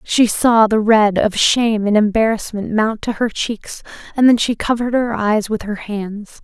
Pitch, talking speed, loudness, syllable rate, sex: 220 Hz, 195 wpm, -16 LUFS, 4.5 syllables/s, female